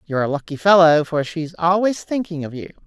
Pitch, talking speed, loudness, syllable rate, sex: 165 Hz, 210 wpm, -18 LUFS, 5.6 syllables/s, female